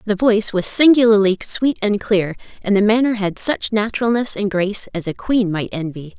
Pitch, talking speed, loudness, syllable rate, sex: 210 Hz, 195 wpm, -17 LUFS, 5.3 syllables/s, female